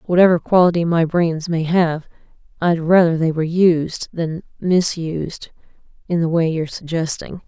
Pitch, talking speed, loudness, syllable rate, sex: 165 Hz, 145 wpm, -18 LUFS, 4.7 syllables/s, female